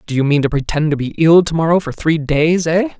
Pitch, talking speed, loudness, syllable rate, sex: 160 Hz, 280 wpm, -15 LUFS, 5.8 syllables/s, male